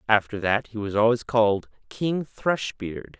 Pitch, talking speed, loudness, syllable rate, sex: 115 Hz, 150 wpm, -24 LUFS, 4.2 syllables/s, male